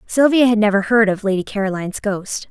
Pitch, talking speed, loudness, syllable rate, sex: 210 Hz, 190 wpm, -17 LUFS, 5.9 syllables/s, female